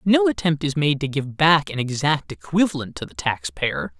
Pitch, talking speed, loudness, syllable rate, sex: 145 Hz, 210 wpm, -21 LUFS, 4.9 syllables/s, male